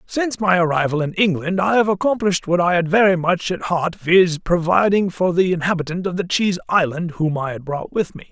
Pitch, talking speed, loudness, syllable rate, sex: 180 Hz, 215 wpm, -18 LUFS, 5.7 syllables/s, male